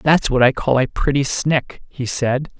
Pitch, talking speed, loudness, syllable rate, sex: 135 Hz, 210 wpm, -18 LUFS, 4.2 syllables/s, male